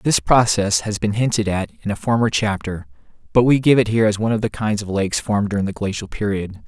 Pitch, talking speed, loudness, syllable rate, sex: 105 Hz, 245 wpm, -19 LUFS, 6.3 syllables/s, male